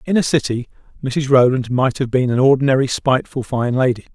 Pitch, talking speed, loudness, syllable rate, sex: 130 Hz, 190 wpm, -17 LUFS, 5.8 syllables/s, male